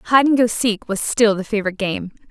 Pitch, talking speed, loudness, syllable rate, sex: 215 Hz, 235 wpm, -18 LUFS, 5.6 syllables/s, female